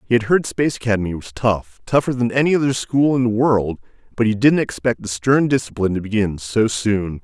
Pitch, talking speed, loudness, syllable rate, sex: 115 Hz, 215 wpm, -19 LUFS, 5.7 syllables/s, male